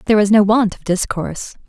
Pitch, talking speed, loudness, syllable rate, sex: 205 Hz, 215 wpm, -16 LUFS, 6.4 syllables/s, female